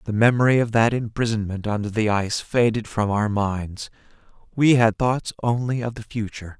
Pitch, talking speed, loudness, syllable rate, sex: 110 Hz, 175 wpm, -22 LUFS, 5.2 syllables/s, male